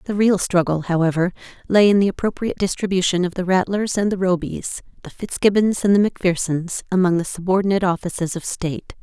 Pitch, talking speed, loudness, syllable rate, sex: 185 Hz, 175 wpm, -19 LUFS, 6.0 syllables/s, female